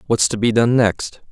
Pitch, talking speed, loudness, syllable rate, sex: 115 Hz, 230 wpm, -16 LUFS, 4.6 syllables/s, male